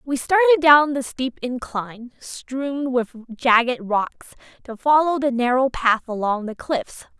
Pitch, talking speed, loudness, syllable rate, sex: 255 Hz, 150 wpm, -20 LUFS, 3.8 syllables/s, female